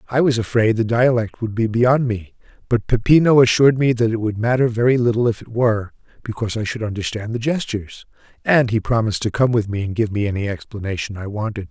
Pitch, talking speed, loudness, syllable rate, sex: 115 Hz, 215 wpm, -19 LUFS, 6.2 syllables/s, male